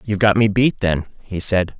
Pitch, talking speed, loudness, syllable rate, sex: 100 Hz, 235 wpm, -18 LUFS, 5.2 syllables/s, male